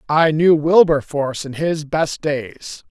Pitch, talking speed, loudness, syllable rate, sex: 150 Hz, 145 wpm, -17 LUFS, 3.7 syllables/s, male